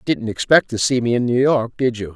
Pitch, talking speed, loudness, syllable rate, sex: 120 Hz, 305 wpm, -18 LUFS, 5.9 syllables/s, male